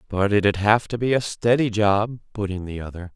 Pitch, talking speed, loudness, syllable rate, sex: 105 Hz, 230 wpm, -22 LUFS, 4.9 syllables/s, male